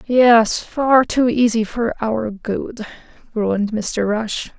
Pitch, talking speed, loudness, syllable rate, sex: 225 Hz, 130 wpm, -18 LUFS, 3.1 syllables/s, female